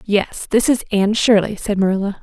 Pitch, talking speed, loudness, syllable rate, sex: 205 Hz, 190 wpm, -17 LUFS, 5.5 syllables/s, female